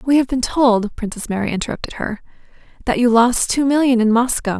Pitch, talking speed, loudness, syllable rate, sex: 240 Hz, 195 wpm, -17 LUFS, 5.7 syllables/s, female